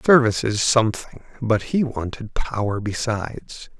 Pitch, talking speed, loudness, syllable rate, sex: 115 Hz, 125 wpm, -22 LUFS, 4.7 syllables/s, male